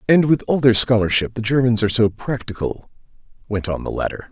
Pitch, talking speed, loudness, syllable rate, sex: 115 Hz, 195 wpm, -18 LUFS, 5.9 syllables/s, male